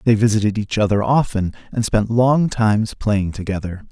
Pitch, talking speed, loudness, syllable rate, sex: 110 Hz, 170 wpm, -18 LUFS, 5.1 syllables/s, male